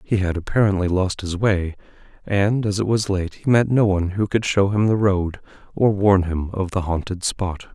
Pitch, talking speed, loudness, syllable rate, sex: 95 Hz, 215 wpm, -20 LUFS, 4.9 syllables/s, male